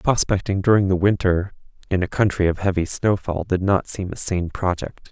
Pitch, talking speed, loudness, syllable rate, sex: 95 Hz, 190 wpm, -21 LUFS, 5.2 syllables/s, male